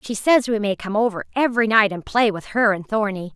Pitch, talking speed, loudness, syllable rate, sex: 215 Hz, 250 wpm, -20 LUFS, 5.8 syllables/s, female